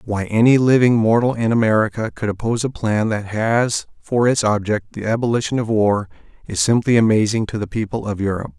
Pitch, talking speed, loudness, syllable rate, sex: 110 Hz, 190 wpm, -18 LUFS, 5.7 syllables/s, male